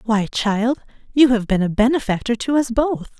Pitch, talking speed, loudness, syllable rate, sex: 235 Hz, 190 wpm, -19 LUFS, 4.8 syllables/s, female